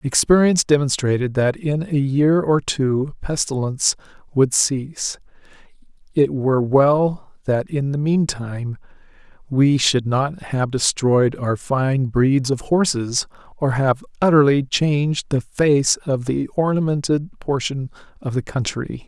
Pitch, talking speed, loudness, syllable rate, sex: 140 Hz, 130 wpm, -19 LUFS, 3.9 syllables/s, male